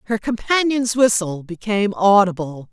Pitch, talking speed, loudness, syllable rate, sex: 210 Hz, 110 wpm, -18 LUFS, 4.7 syllables/s, female